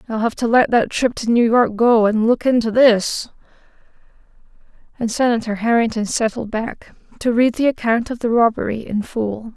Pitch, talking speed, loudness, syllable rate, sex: 230 Hz, 175 wpm, -17 LUFS, 5.0 syllables/s, female